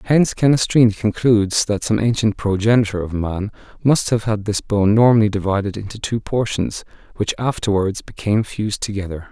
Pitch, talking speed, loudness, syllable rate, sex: 105 Hz, 155 wpm, -18 LUFS, 5.5 syllables/s, male